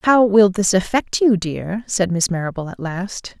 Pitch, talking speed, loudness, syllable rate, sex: 195 Hz, 195 wpm, -18 LUFS, 4.3 syllables/s, female